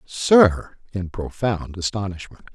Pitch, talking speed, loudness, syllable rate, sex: 100 Hz, 95 wpm, -20 LUFS, 3.6 syllables/s, male